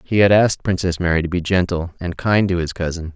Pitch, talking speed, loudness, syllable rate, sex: 90 Hz, 245 wpm, -18 LUFS, 6.0 syllables/s, male